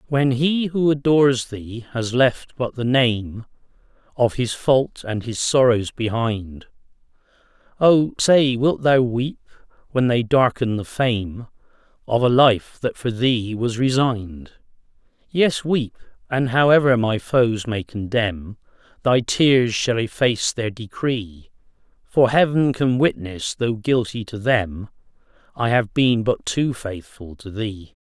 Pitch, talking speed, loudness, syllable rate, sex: 120 Hz, 140 wpm, -20 LUFS, 3.7 syllables/s, male